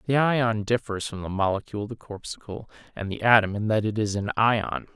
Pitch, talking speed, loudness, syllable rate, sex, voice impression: 110 Hz, 205 wpm, -25 LUFS, 5.4 syllables/s, male, masculine, adult-like, tensed, powerful, clear, fluent, cool, intellectual, friendly, reassuring, elegant, slightly wild, lively, slightly kind